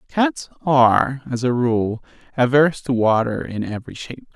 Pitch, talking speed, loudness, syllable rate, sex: 125 Hz, 150 wpm, -19 LUFS, 5.0 syllables/s, male